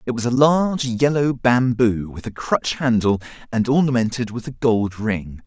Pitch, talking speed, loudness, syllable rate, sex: 120 Hz, 175 wpm, -20 LUFS, 4.6 syllables/s, male